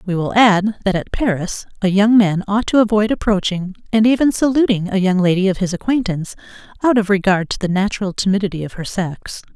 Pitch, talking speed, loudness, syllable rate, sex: 200 Hz, 200 wpm, -17 LUFS, 5.8 syllables/s, female